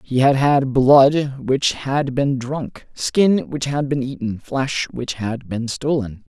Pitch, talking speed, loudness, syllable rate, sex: 135 Hz, 170 wpm, -19 LUFS, 3.3 syllables/s, male